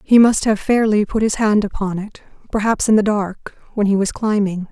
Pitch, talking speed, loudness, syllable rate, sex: 210 Hz, 215 wpm, -17 LUFS, 5.1 syllables/s, female